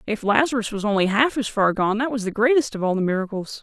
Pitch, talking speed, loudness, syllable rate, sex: 220 Hz, 265 wpm, -21 LUFS, 6.3 syllables/s, female